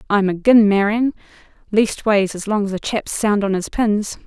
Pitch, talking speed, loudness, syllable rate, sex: 210 Hz, 185 wpm, -18 LUFS, 4.7 syllables/s, female